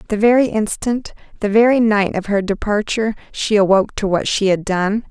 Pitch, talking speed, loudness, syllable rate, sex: 210 Hz, 175 wpm, -17 LUFS, 5.4 syllables/s, female